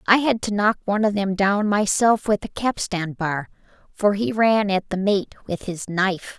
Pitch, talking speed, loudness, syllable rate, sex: 200 Hz, 205 wpm, -21 LUFS, 4.7 syllables/s, female